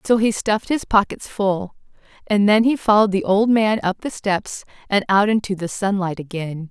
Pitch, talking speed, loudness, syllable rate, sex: 205 Hz, 195 wpm, -19 LUFS, 5.0 syllables/s, female